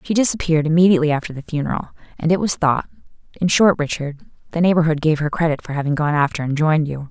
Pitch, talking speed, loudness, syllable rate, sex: 160 Hz, 205 wpm, -18 LUFS, 7.1 syllables/s, female